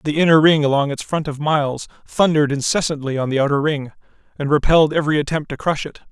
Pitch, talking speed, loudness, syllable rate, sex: 150 Hz, 205 wpm, -18 LUFS, 6.6 syllables/s, male